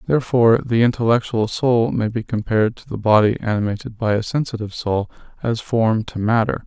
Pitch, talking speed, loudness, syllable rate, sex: 110 Hz, 170 wpm, -19 LUFS, 5.7 syllables/s, male